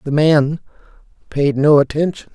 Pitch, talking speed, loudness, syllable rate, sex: 150 Hz, 130 wpm, -15 LUFS, 4.6 syllables/s, male